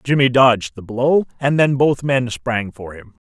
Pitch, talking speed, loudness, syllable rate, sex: 125 Hz, 200 wpm, -17 LUFS, 4.4 syllables/s, male